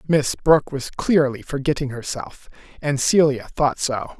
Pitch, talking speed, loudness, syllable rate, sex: 140 Hz, 145 wpm, -21 LUFS, 4.7 syllables/s, male